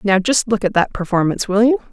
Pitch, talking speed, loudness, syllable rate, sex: 210 Hz, 250 wpm, -17 LUFS, 6.4 syllables/s, female